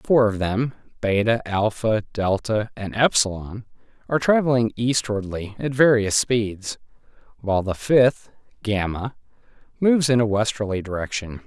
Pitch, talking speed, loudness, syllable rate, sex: 110 Hz, 120 wpm, -22 LUFS, 4.5 syllables/s, male